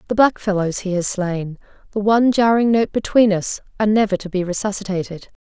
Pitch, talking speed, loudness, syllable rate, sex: 200 Hz, 165 wpm, -18 LUFS, 5.9 syllables/s, female